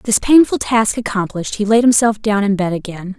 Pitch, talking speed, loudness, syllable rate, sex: 215 Hz, 205 wpm, -15 LUFS, 5.4 syllables/s, female